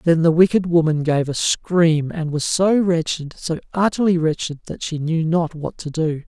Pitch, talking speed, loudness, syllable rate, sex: 165 Hz, 200 wpm, -19 LUFS, 4.5 syllables/s, male